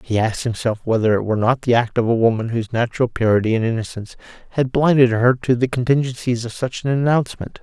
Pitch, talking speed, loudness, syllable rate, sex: 120 Hz, 210 wpm, -19 LUFS, 6.7 syllables/s, male